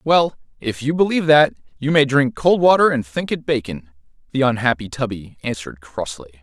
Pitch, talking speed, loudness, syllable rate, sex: 150 Hz, 175 wpm, -19 LUFS, 5.4 syllables/s, male